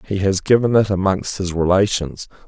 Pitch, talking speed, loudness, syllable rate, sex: 95 Hz, 170 wpm, -18 LUFS, 5.1 syllables/s, male